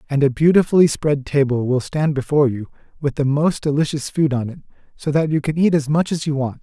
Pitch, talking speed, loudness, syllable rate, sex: 145 Hz, 235 wpm, -18 LUFS, 5.8 syllables/s, male